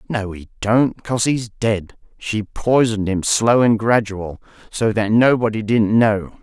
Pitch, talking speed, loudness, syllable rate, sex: 110 Hz, 160 wpm, -18 LUFS, 3.9 syllables/s, male